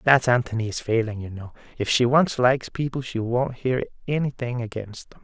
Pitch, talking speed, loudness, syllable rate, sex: 120 Hz, 185 wpm, -24 LUFS, 5.2 syllables/s, male